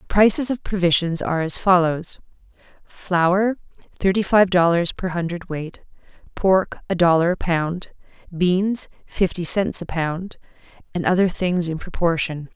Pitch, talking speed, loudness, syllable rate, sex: 180 Hz, 140 wpm, -20 LUFS, 4.4 syllables/s, female